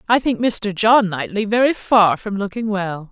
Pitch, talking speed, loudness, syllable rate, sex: 210 Hz, 195 wpm, -17 LUFS, 4.4 syllables/s, female